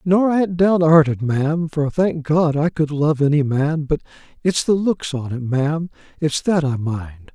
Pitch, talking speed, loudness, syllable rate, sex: 155 Hz, 195 wpm, -19 LUFS, 4.4 syllables/s, male